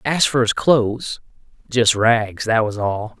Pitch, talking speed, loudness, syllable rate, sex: 115 Hz, 170 wpm, -18 LUFS, 3.9 syllables/s, male